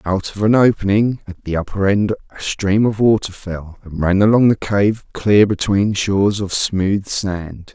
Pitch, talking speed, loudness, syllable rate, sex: 100 Hz, 185 wpm, -17 LUFS, 4.3 syllables/s, male